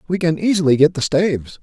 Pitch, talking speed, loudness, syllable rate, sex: 165 Hz, 220 wpm, -16 LUFS, 6.1 syllables/s, male